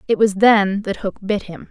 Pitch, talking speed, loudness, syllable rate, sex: 205 Hz, 245 wpm, -17 LUFS, 4.5 syllables/s, female